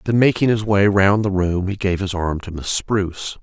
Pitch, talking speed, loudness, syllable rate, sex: 95 Hz, 245 wpm, -19 LUFS, 4.9 syllables/s, male